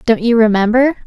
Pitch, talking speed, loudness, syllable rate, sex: 230 Hz, 170 wpm, -12 LUFS, 5.8 syllables/s, female